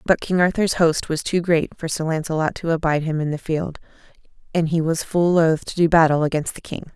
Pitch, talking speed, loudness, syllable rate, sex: 160 Hz, 235 wpm, -20 LUFS, 5.6 syllables/s, female